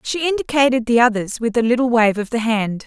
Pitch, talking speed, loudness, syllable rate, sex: 240 Hz, 230 wpm, -17 LUFS, 5.8 syllables/s, female